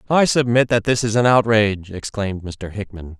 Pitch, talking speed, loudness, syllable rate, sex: 110 Hz, 190 wpm, -18 LUFS, 5.4 syllables/s, male